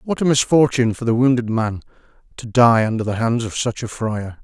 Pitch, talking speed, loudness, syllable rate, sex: 120 Hz, 215 wpm, -18 LUFS, 5.6 syllables/s, male